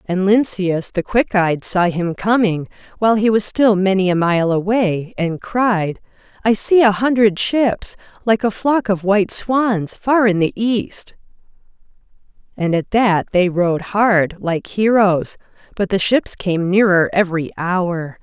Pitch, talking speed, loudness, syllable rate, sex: 195 Hz, 160 wpm, -17 LUFS, 4.0 syllables/s, female